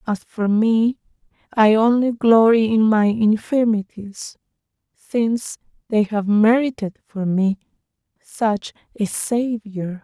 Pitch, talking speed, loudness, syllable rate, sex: 220 Hz, 110 wpm, -19 LUFS, 3.6 syllables/s, female